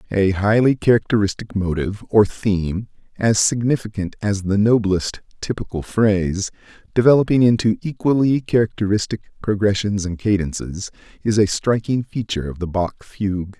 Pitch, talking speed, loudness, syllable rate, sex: 105 Hz, 125 wpm, -19 LUFS, 5.2 syllables/s, male